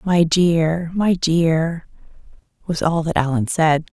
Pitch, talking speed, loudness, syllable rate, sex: 165 Hz, 135 wpm, -18 LUFS, 3.3 syllables/s, female